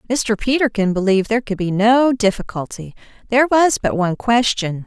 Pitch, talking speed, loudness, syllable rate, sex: 225 Hz, 160 wpm, -17 LUFS, 5.7 syllables/s, female